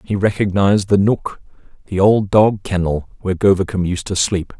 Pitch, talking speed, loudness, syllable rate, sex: 95 Hz, 170 wpm, -16 LUFS, 5.1 syllables/s, male